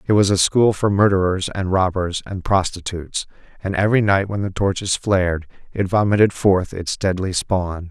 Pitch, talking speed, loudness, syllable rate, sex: 95 Hz, 175 wpm, -19 LUFS, 5.0 syllables/s, male